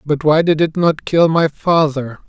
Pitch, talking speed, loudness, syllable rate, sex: 155 Hz, 210 wpm, -15 LUFS, 4.2 syllables/s, male